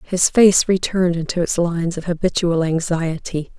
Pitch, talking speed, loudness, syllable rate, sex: 175 Hz, 150 wpm, -18 LUFS, 4.9 syllables/s, female